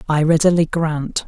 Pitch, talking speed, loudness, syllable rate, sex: 160 Hz, 140 wpm, -17 LUFS, 4.6 syllables/s, male